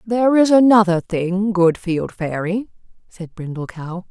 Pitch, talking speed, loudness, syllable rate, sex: 190 Hz, 145 wpm, -17 LUFS, 4.2 syllables/s, female